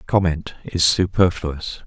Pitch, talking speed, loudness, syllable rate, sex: 85 Hz, 95 wpm, -20 LUFS, 3.8 syllables/s, male